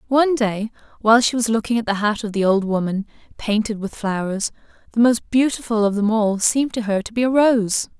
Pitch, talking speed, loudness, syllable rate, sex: 220 Hz, 220 wpm, -19 LUFS, 5.6 syllables/s, female